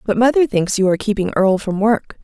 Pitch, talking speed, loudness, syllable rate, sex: 210 Hz, 240 wpm, -16 LUFS, 6.3 syllables/s, female